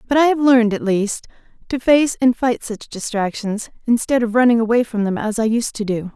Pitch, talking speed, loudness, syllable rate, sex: 230 Hz, 225 wpm, -18 LUFS, 5.3 syllables/s, female